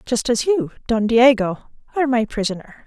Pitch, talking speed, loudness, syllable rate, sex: 235 Hz, 165 wpm, -19 LUFS, 5.3 syllables/s, female